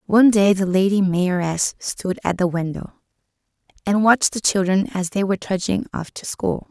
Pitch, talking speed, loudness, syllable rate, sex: 195 Hz, 180 wpm, -20 LUFS, 5.1 syllables/s, female